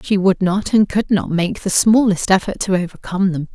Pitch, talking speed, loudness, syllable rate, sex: 190 Hz, 220 wpm, -17 LUFS, 5.3 syllables/s, female